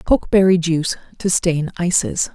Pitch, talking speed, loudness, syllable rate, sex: 175 Hz, 130 wpm, -18 LUFS, 5.1 syllables/s, female